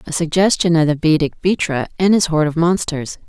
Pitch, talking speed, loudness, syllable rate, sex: 165 Hz, 200 wpm, -16 LUFS, 5.7 syllables/s, female